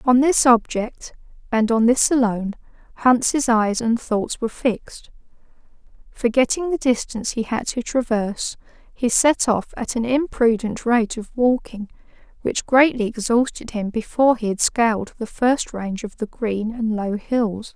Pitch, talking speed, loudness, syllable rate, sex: 235 Hz, 155 wpm, -20 LUFS, 4.5 syllables/s, female